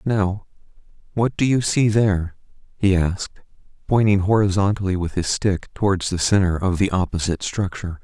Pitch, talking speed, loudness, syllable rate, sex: 95 Hz, 150 wpm, -20 LUFS, 5.3 syllables/s, male